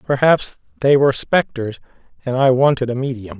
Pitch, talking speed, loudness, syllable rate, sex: 130 Hz, 160 wpm, -17 LUFS, 5.2 syllables/s, male